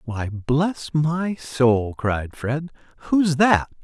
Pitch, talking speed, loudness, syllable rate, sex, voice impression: 145 Hz, 125 wpm, -21 LUFS, 2.6 syllables/s, male, masculine, adult-like, powerful, bright, clear, fluent, cool, friendly, wild, lively, slightly strict, slightly sharp